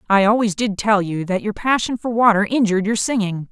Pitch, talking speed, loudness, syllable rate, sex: 210 Hz, 220 wpm, -18 LUFS, 5.7 syllables/s, female